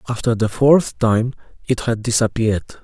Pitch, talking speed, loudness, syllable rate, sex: 115 Hz, 150 wpm, -18 LUFS, 5.1 syllables/s, male